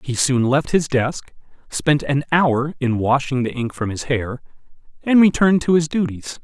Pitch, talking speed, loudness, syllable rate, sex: 140 Hz, 185 wpm, -19 LUFS, 4.6 syllables/s, male